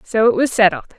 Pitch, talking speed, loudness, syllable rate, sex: 220 Hz, 245 wpm, -15 LUFS, 6.5 syllables/s, female